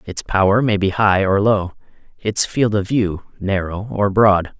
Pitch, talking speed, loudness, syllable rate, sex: 100 Hz, 185 wpm, -17 LUFS, 4.0 syllables/s, male